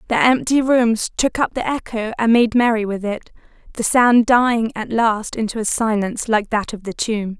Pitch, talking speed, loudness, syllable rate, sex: 225 Hz, 205 wpm, -18 LUFS, 4.9 syllables/s, female